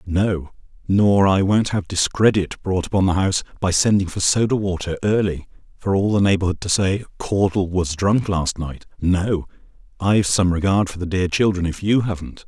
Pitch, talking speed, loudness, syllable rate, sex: 95 Hz, 185 wpm, -20 LUFS, 5.0 syllables/s, male